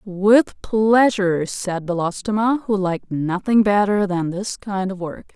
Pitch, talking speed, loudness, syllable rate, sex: 195 Hz, 145 wpm, -19 LUFS, 4.1 syllables/s, female